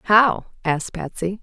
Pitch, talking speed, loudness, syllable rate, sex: 190 Hz, 125 wpm, -21 LUFS, 4.7 syllables/s, female